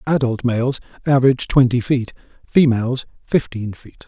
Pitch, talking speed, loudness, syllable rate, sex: 125 Hz, 120 wpm, -18 LUFS, 5.1 syllables/s, male